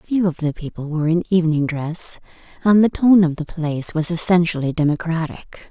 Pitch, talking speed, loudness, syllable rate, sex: 165 Hz, 180 wpm, -19 LUFS, 5.4 syllables/s, female